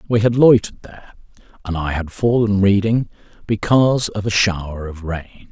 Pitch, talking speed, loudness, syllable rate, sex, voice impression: 100 Hz, 165 wpm, -17 LUFS, 5.4 syllables/s, male, masculine, middle-aged, tensed, powerful, hard, halting, raspy, calm, mature, reassuring, slightly wild, strict, modest